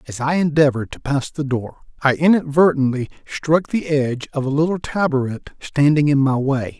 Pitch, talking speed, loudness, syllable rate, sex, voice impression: 145 Hz, 175 wpm, -19 LUFS, 5.4 syllables/s, male, masculine, middle-aged, slightly relaxed, powerful, bright, muffled, raspy, calm, mature, friendly, reassuring, wild, lively, kind